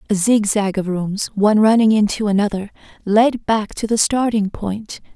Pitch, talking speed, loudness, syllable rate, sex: 210 Hz, 165 wpm, -17 LUFS, 4.7 syllables/s, female